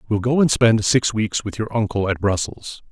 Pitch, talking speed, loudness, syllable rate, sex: 110 Hz, 225 wpm, -19 LUFS, 4.9 syllables/s, male